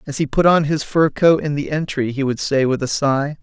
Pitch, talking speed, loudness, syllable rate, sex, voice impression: 145 Hz, 280 wpm, -18 LUFS, 5.2 syllables/s, male, masculine, very adult-like, middle-aged, thick, slightly tensed, slightly weak, slightly bright, slightly soft, slightly clear, slightly fluent, slightly cool, slightly intellectual, refreshing, slightly calm, friendly, slightly reassuring, slightly elegant, very kind, slightly modest